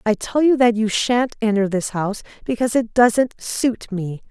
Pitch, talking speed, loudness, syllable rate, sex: 225 Hz, 195 wpm, -19 LUFS, 4.7 syllables/s, female